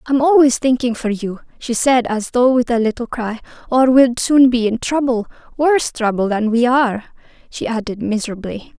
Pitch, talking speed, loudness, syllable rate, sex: 240 Hz, 180 wpm, -16 LUFS, 5.1 syllables/s, female